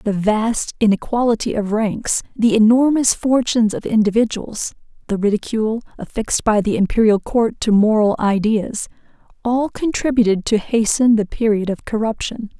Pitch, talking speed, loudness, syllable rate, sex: 220 Hz, 135 wpm, -18 LUFS, 4.9 syllables/s, female